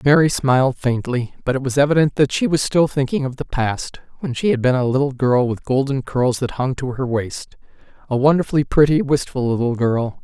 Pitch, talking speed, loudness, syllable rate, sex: 135 Hz, 210 wpm, -19 LUFS, 5.4 syllables/s, male